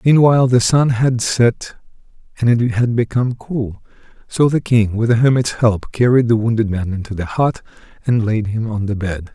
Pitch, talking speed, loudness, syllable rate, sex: 115 Hz, 195 wpm, -16 LUFS, 5.0 syllables/s, male